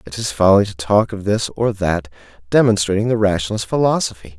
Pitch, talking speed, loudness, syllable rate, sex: 100 Hz, 180 wpm, -17 LUFS, 5.9 syllables/s, male